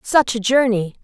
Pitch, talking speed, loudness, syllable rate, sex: 235 Hz, 175 wpm, -17 LUFS, 4.6 syllables/s, female